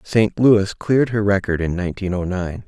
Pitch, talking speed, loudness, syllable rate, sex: 100 Hz, 200 wpm, -19 LUFS, 5.1 syllables/s, male